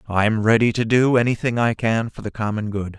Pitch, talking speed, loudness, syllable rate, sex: 110 Hz, 220 wpm, -20 LUFS, 5.3 syllables/s, male